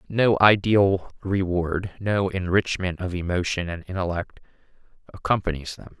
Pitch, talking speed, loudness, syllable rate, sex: 95 Hz, 110 wpm, -23 LUFS, 4.4 syllables/s, male